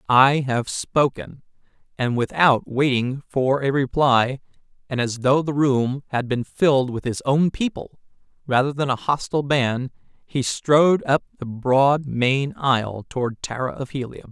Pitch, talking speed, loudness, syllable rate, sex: 135 Hz, 155 wpm, -21 LUFS, 4.2 syllables/s, male